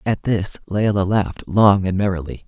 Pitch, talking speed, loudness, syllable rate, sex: 100 Hz, 170 wpm, -19 LUFS, 4.9 syllables/s, male